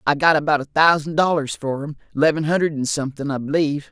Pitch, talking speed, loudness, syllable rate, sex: 145 Hz, 200 wpm, -20 LUFS, 6.6 syllables/s, male